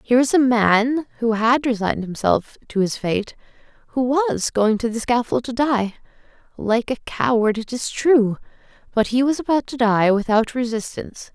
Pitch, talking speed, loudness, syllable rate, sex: 235 Hz, 170 wpm, -20 LUFS, 4.8 syllables/s, female